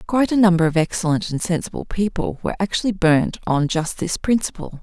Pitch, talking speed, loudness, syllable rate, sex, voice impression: 180 Hz, 185 wpm, -20 LUFS, 6.0 syllables/s, female, feminine, adult-like, tensed, slightly powerful, clear, fluent, intellectual, calm, slightly reassuring, elegant, slightly strict, slightly sharp